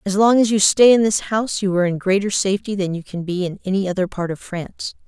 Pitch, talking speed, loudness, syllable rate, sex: 195 Hz, 270 wpm, -18 LUFS, 6.4 syllables/s, female